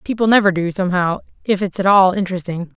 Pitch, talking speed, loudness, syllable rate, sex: 190 Hz, 195 wpm, -17 LUFS, 6.6 syllables/s, female